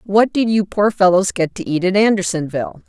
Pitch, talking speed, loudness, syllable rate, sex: 190 Hz, 210 wpm, -16 LUFS, 5.5 syllables/s, female